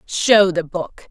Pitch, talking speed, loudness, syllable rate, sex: 185 Hz, 165 wpm, -16 LUFS, 3.1 syllables/s, female